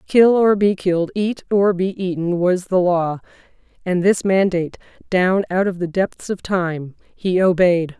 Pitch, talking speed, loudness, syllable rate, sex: 185 Hz, 175 wpm, -18 LUFS, 4.2 syllables/s, female